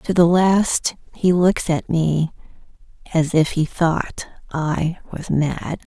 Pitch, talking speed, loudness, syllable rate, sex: 170 Hz, 140 wpm, -20 LUFS, 3.2 syllables/s, female